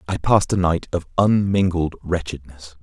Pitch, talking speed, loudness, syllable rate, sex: 90 Hz, 150 wpm, -20 LUFS, 4.9 syllables/s, male